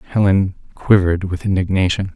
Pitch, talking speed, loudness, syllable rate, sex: 95 Hz, 110 wpm, -17 LUFS, 5.6 syllables/s, male